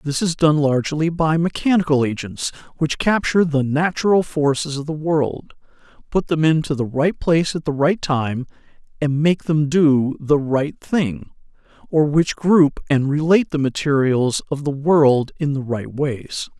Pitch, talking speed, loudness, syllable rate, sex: 150 Hz, 165 wpm, -19 LUFS, 4.4 syllables/s, male